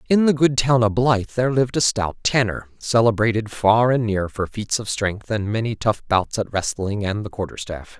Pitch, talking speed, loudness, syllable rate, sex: 110 Hz, 210 wpm, -20 LUFS, 5.0 syllables/s, male